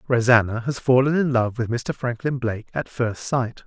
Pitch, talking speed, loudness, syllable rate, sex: 120 Hz, 195 wpm, -22 LUFS, 4.9 syllables/s, male